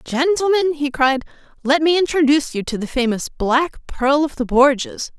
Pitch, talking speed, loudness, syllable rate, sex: 285 Hz, 175 wpm, -18 LUFS, 5.0 syllables/s, female